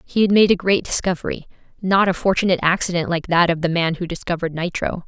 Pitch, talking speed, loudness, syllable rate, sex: 175 Hz, 200 wpm, -19 LUFS, 6.5 syllables/s, female